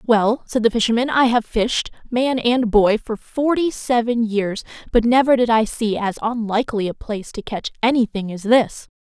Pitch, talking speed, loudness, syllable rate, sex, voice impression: 230 Hz, 185 wpm, -19 LUFS, 4.8 syllables/s, female, very feminine, slightly young, cute, refreshing, friendly, slightly sweet, slightly kind